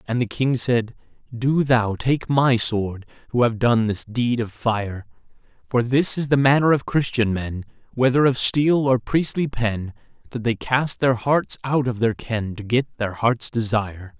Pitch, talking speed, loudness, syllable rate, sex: 120 Hz, 185 wpm, -21 LUFS, 4.1 syllables/s, male